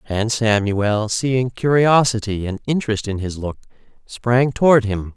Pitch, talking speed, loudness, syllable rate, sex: 115 Hz, 140 wpm, -18 LUFS, 4.3 syllables/s, male